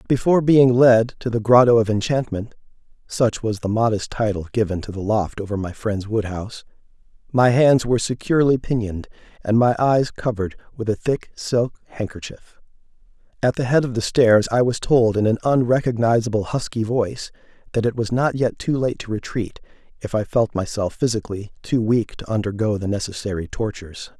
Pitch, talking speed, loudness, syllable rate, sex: 115 Hz, 170 wpm, -20 LUFS, 5.5 syllables/s, male